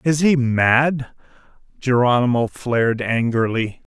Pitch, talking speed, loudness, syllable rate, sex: 125 Hz, 90 wpm, -18 LUFS, 3.9 syllables/s, male